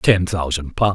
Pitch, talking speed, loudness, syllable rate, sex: 90 Hz, 190 wpm, -20 LUFS, 4.4 syllables/s, male